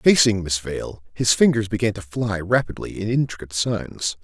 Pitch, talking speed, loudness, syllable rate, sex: 105 Hz, 170 wpm, -22 LUFS, 4.9 syllables/s, male